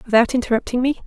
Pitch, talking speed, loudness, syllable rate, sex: 245 Hz, 170 wpm, -19 LUFS, 7.8 syllables/s, female